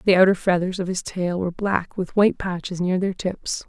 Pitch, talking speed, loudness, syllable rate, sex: 185 Hz, 230 wpm, -22 LUFS, 5.4 syllables/s, female